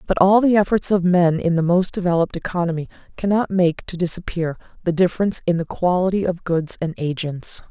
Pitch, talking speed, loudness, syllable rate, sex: 175 Hz, 185 wpm, -20 LUFS, 5.8 syllables/s, female